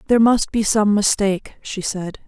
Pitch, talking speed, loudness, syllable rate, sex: 205 Hz, 185 wpm, -18 LUFS, 5.0 syllables/s, female